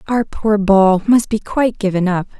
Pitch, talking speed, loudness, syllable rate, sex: 205 Hz, 200 wpm, -15 LUFS, 4.7 syllables/s, female